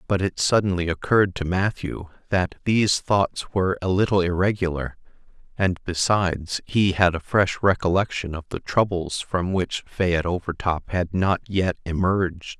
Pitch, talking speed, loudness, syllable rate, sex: 90 Hz, 150 wpm, -23 LUFS, 4.8 syllables/s, male